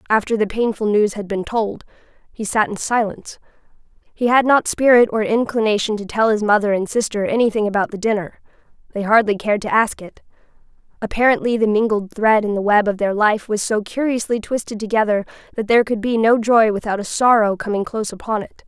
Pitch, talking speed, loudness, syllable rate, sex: 215 Hz, 195 wpm, -18 LUFS, 5.8 syllables/s, female